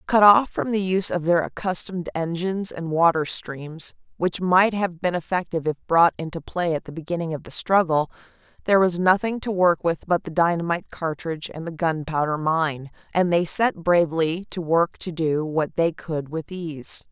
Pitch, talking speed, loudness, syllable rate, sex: 170 Hz, 190 wpm, -22 LUFS, 5.1 syllables/s, female